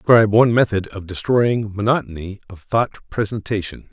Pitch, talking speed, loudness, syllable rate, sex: 105 Hz, 140 wpm, -19 LUFS, 5.7 syllables/s, male